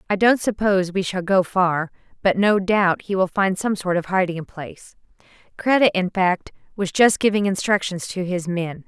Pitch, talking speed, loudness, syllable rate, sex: 190 Hz, 190 wpm, -20 LUFS, 4.8 syllables/s, female